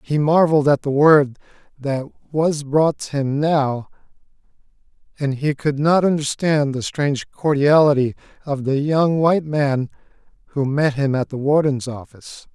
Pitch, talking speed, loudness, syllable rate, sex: 145 Hz, 150 wpm, -19 LUFS, 4.4 syllables/s, male